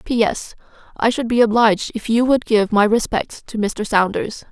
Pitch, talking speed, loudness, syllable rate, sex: 225 Hz, 185 wpm, -18 LUFS, 4.8 syllables/s, female